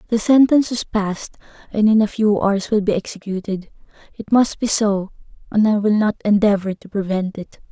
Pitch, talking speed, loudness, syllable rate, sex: 205 Hz, 185 wpm, -18 LUFS, 5.4 syllables/s, female